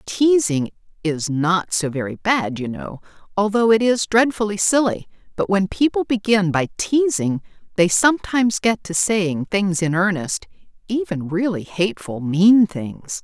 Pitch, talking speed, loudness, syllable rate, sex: 190 Hz, 140 wpm, -19 LUFS, 4.3 syllables/s, female